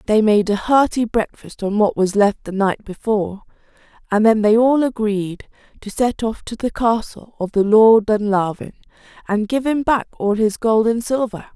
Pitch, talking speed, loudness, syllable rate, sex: 220 Hz, 190 wpm, -18 LUFS, 4.7 syllables/s, female